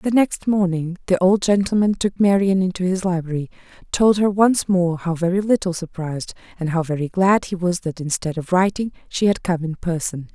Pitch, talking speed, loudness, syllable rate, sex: 180 Hz, 195 wpm, -20 LUFS, 5.2 syllables/s, female